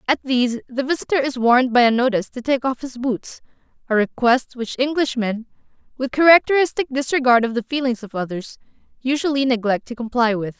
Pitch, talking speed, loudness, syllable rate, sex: 250 Hz, 175 wpm, -19 LUFS, 5.8 syllables/s, female